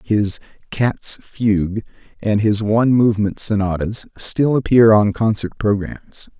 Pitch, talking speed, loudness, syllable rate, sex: 105 Hz, 120 wpm, -17 LUFS, 4.4 syllables/s, male